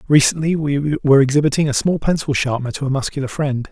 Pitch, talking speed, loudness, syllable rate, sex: 145 Hz, 195 wpm, -17 LUFS, 7.1 syllables/s, male